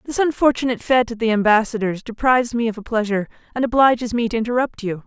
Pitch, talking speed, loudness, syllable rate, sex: 230 Hz, 200 wpm, -19 LUFS, 7.1 syllables/s, female